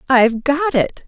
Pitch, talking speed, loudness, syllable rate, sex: 270 Hz, 170 wpm, -16 LUFS, 4.5 syllables/s, female